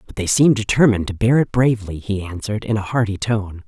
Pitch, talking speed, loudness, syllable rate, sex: 105 Hz, 230 wpm, -18 LUFS, 6.2 syllables/s, female